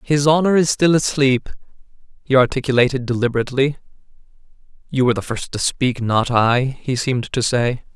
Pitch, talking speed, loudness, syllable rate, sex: 130 Hz, 150 wpm, -18 LUFS, 3.8 syllables/s, male